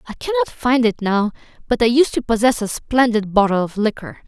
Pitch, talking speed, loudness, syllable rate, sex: 235 Hz, 210 wpm, -18 LUFS, 5.5 syllables/s, female